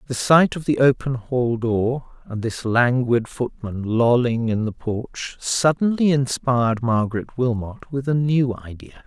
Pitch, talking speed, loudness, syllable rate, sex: 120 Hz, 150 wpm, -21 LUFS, 4.1 syllables/s, male